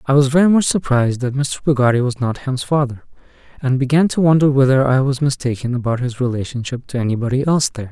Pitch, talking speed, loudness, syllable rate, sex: 135 Hz, 205 wpm, -17 LUFS, 6.5 syllables/s, male